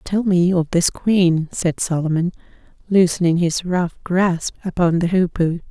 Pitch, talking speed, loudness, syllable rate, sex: 175 Hz, 145 wpm, -18 LUFS, 4.2 syllables/s, female